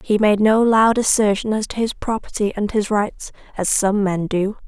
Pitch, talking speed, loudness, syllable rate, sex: 210 Hz, 205 wpm, -18 LUFS, 4.7 syllables/s, female